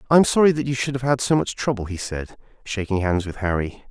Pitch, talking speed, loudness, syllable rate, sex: 115 Hz, 260 wpm, -22 LUFS, 6.3 syllables/s, male